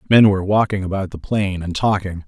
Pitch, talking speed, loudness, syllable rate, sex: 95 Hz, 210 wpm, -18 LUFS, 5.9 syllables/s, male